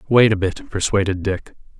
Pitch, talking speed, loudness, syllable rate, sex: 105 Hz, 165 wpm, -19 LUFS, 5.0 syllables/s, male